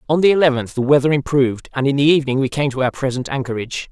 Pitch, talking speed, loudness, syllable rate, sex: 135 Hz, 245 wpm, -17 LUFS, 7.3 syllables/s, male